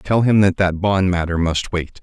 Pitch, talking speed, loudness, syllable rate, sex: 95 Hz, 235 wpm, -17 LUFS, 4.5 syllables/s, male